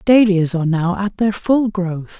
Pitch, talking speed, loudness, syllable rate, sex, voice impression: 195 Hz, 190 wpm, -17 LUFS, 4.3 syllables/s, female, very feminine, very adult-like, old, very thin, very relaxed, very weak, slightly bright, very soft, muffled, slightly halting, raspy, cute, very intellectual, refreshing, very sincere, very calm, very friendly, reassuring, very unique, very elegant, very sweet, slightly lively, very kind, slightly intense, very modest, very light